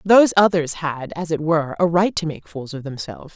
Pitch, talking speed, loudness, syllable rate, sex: 165 Hz, 235 wpm, -20 LUFS, 5.7 syllables/s, female